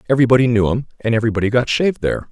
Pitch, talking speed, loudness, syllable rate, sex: 120 Hz, 205 wpm, -17 LUFS, 9.0 syllables/s, male